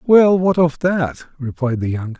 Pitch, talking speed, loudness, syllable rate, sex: 150 Hz, 190 wpm, -17 LUFS, 4.4 syllables/s, male